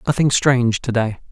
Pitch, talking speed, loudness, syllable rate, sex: 120 Hz, 185 wpm, -17 LUFS, 5.6 syllables/s, male